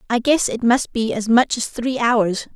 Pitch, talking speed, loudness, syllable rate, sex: 235 Hz, 235 wpm, -18 LUFS, 4.3 syllables/s, female